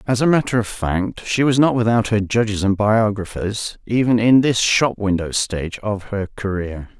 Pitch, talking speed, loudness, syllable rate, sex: 110 Hz, 190 wpm, -18 LUFS, 4.7 syllables/s, male